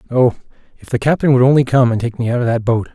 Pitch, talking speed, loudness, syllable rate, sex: 125 Hz, 285 wpm, -15 LUFS, 7.0 syllables/s, male